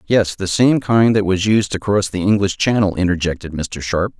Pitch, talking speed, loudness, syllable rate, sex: 100 Hz, 215 wpm, -17 LUFS, 5.0 syllables/s, male